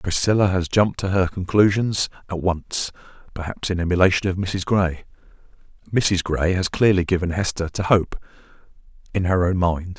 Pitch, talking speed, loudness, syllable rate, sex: 90 Hz, 150 wpm, -21 LUFS, 5.1 syllables/s, male